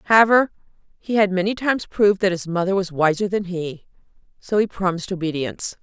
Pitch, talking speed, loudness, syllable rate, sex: 190 Hz, 175 wpm, -20 LUFS, 6.2 syllables/s, female